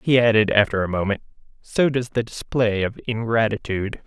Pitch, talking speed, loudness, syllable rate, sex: 110 Hz, 160 wpm, -21 LUFS, 5.4 syllables/s, male